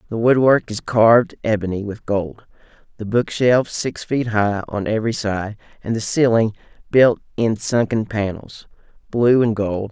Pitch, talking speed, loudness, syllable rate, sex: 110 Hz, 155 wpm, -19 LUFS, 4.6 syllables/s, male